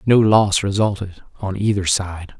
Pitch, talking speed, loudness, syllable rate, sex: 100 Hz, 150 wpm, -18 LUFS, 4.7 syllables/s, male